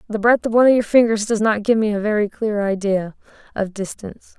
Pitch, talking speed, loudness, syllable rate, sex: 210 Hz, 235 wpm, -18 LUFS, 6.0 syllables/s, female